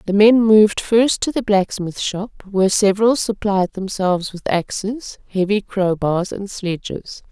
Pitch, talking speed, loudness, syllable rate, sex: 200 Hz, 155 wpm, -18 LUFS, 4.3 syllables/s, female